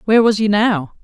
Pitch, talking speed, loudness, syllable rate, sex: 210 Hz, 235 wpm, -15 LUFS, 5.8 syllables/s, female